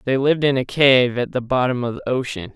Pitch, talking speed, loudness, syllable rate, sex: 130 Hz, 260 wpm, -19 LUFS, 5.9 syllables/s, male